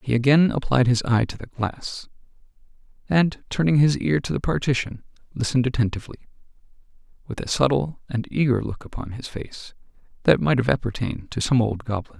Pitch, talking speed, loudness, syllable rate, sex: 125 Hz, 165 wpm, -23 LUFS, 5.7 syllables/s, male